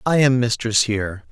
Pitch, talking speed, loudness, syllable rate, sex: 120 Hz, 185 wpm, -19 LUFS, 5.2 syllables/s, male